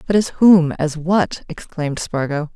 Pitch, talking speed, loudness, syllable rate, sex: 165 Hz, 140 wpm, -17 LUFS, 4.4 syllables/s, female